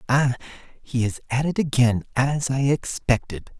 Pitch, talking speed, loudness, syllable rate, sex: 130 Hz, 150 wpm, -23 LUFS, 4.3 syllables/s, male